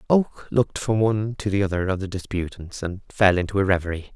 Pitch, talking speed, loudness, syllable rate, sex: 100 Hz, 215 wpm, -23 LUFS, 6.0 syllables/s, male